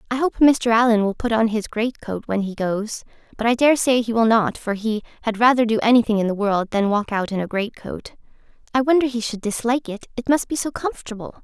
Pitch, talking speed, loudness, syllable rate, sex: 230 Hz, 235 wpm, -20 LUFS, 5.8 syllables/s, female